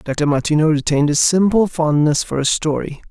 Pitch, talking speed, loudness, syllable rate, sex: 155 Hz, 175 wpm, -16 LUFS, 5.5 syllables/s, male